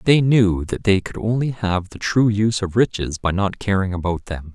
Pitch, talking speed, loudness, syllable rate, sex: 100 Hz, 225 wpm, -20 LUFS, 5.0 syllables/s, male